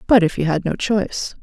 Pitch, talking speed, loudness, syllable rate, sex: 190 Hz, 255 wpm, -19 LUFS, 5.7 syllables/s, female